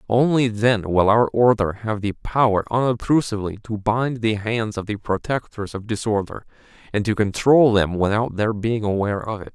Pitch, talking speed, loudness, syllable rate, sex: 110 Hz, 175 wpm, -20 LUFS, 5.0 syllables/s, male